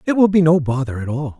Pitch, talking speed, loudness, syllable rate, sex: 150 Hz, 300 wpm, -17 LUFS, 6.4 syllables/s, male